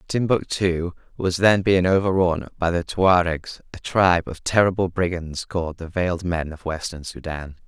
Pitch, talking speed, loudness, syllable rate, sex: 90 Hz, 155 wpm, -22 LUFS, 4.9 syllables/s, male